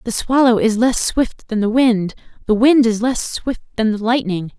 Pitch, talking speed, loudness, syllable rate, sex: 230 Hz, 210 wpm, -16 LUFS, 4.6 syllables/s, female